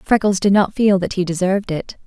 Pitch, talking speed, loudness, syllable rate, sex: 190 Hz, 230 wpm, -17 LUFS, 5.8 syllables/s, female